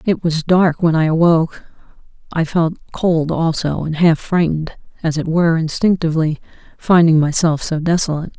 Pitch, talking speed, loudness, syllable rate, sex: 165 Hz, 150 wpm, -16 LUFS, 5.3 syllables/s, female